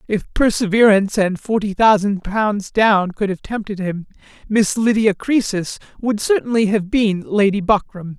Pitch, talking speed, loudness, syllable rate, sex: 205 Hz, 145 wpm, -17 LUFS, 4.4 syllables/s, male